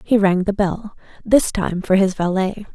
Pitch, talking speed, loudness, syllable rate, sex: 195 Hz, 195 wpm, -18 LUFS, 4.3 syllables/s, female